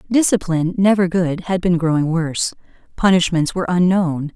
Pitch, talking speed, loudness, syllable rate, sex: 175 Hz, 140 wpm, -17 LUFS, 5.5 syllables/s, female